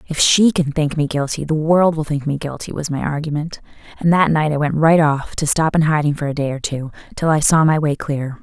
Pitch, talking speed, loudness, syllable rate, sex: 150 Hz, 265 wpm, -17 LUFS, 5.5 syllables/s, female